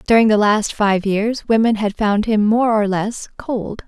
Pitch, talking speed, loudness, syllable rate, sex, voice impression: 215 Hz, 200 wpm, -17 LUFS, 4.1 syllables/s, female, feminine, adult-like, tensed, powerful, bright, soft, clear, fluent, calm, friendly, reassuring, elegant, lively, kind